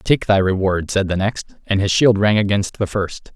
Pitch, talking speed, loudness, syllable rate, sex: 100 Hz, 235 wpm, -18 LUFS, 4.7 syllables/s, male